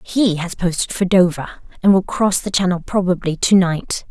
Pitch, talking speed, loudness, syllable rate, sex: 185 Hz, 190 wpm, -17 LUFS, 4.8 syllables/s, female